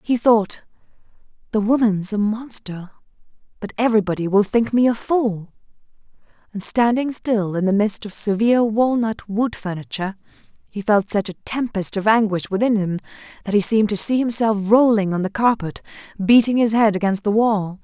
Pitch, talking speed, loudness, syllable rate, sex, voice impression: 215 Hz, 165 wpm, -19 LUFS, 5.1 syllables/s, female, very feminine, slightly young, adult-like, thin, tensed, powerful, bright, very hard, very clear, very fluent, slightly cute, cool, very intellectual, very refreshing, sincere, slightly calm, friendly, reassuring, unique, slightly elegant, wild, slightly sweet, lively, strict, intense, sharp